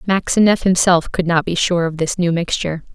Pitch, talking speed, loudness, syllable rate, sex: 175 Hz, 205 wpm, -16 LUFS, 5.5 syllables/s, female